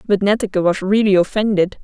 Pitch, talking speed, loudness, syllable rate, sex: 195 Hz, 165 wpm, -16 LUFS, 5.8 syllables/s, female